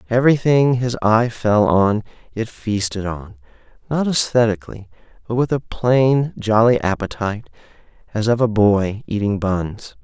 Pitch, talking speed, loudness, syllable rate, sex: 110 Hz, 130 wpm, -18 LUFS, 4.5 syllables/s, male